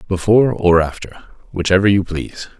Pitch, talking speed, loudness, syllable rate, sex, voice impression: 95 Hz, 140 wpm, -15 LUFS, 5.7 syllables/s, male, masculine, adult-like, thick, cool, wild